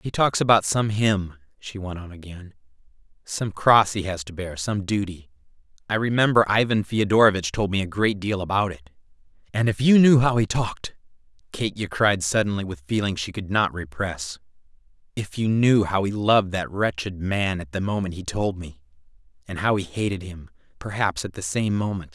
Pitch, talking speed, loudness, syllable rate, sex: 100 Hz, 185 wpm, -23 LUFS, 5.1 syllables/s, male